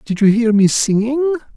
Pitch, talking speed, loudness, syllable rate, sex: 240 Hz, 190 wpm, -15 LUFS, 5.4 syllables/s, male